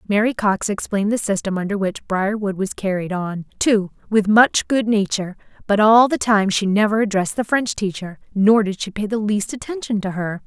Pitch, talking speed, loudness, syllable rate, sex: 205 Hz, 200 wpm, -19 LUFS, 5.2 syllables/s, female